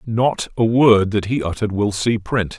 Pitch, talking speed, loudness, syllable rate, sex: 110 Hz, 210 wpm, -18 LUFS, 4.6 syllables/s, male